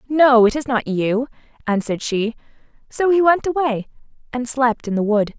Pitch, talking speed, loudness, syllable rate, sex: 250 Hz, 180 wpm, -18 LUFS, 5.0 syllables/s, female